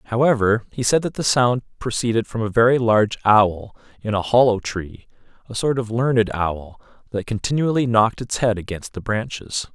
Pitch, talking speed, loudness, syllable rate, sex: 115 Hz, 180 wpm, -20 LUFS, 5.1 syllables/s, male